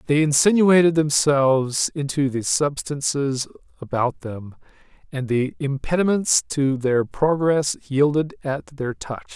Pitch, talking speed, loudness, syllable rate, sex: 145 Hz, 115 wpm, -20 LUFS, 4.0 syllables/s, male